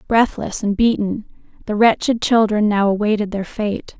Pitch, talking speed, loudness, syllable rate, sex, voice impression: 210 Hz, 150 wpm, -18 LUFS, 4.7 syllables/s, female, masculine, feminine, adult-like, slightly muffled, calm, friendly, kind